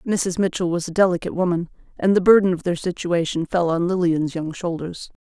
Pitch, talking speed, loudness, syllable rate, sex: 175 Hz, 195 wpm, -21 LUFS, 5.8 syllables/s, female